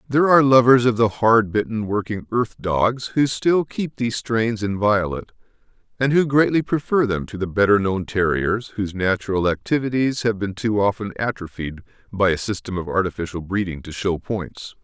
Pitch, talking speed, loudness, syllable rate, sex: 105 Hz, 175 wpm, -20 LUFS, 5.2 syllables/s, male